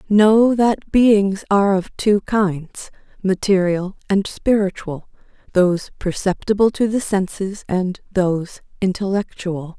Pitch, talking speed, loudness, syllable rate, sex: 195 Hz, 110 wpm, -18 LUFS, 3.9 syllables/s, female